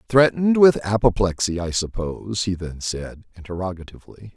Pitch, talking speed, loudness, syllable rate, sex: 100 Hz, 125 wpm, -21 LUFS, 5.5 syllables/s, male